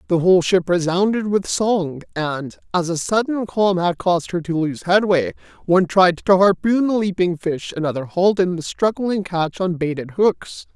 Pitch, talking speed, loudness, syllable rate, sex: 180 Hz, 185 wpm, -19 LUFS, 4.8 syllables/s, male